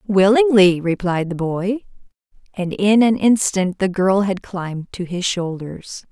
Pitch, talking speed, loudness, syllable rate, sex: 195 Hz, 145 wpm, -18 LUFS, 4.0 syllables/s, female